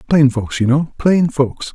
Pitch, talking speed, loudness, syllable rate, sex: 140 Hz, 170 wpm, -16 LUFS, 4.0 syllables/s, male